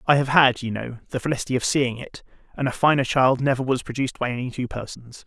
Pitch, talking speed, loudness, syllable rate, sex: 130 Hz, 240 wpm, -22 LUFS, 6.4 syllables/s, male